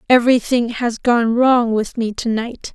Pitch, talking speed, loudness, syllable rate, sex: 235 Hz, 175 wpm, -17 LUFS, 4.3 syllables/s, female